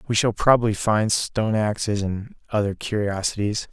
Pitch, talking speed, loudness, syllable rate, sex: 105 Hz, 145 wpm, -22 LUFS, 5.0 syllables/s, male